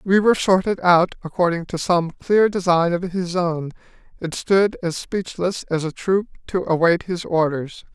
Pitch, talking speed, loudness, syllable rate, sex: 175 Hz, 175 wpm, -20 LUFS, 4.5 syllables/s, male